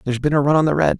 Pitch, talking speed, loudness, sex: 130 Hz, 425 wpm, -17 LUFS, male